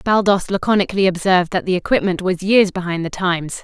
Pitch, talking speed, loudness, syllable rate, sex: 185 Hz, 180 wpm, -17 LUFS, 6.2 syllables/s, female